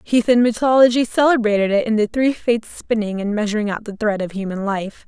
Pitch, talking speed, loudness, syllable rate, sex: 220 Hz, 200 wpm, -18 LUFS, 5.9 syllables/s, female